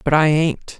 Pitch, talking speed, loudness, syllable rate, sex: 155 Hz, 225 wpm, -17 LUFS, 4.4 syllables/s, female